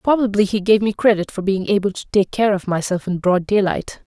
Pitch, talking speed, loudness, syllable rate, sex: 200 Hz, 230 wpm, -18 LUFS, 5.5 syllables/s, female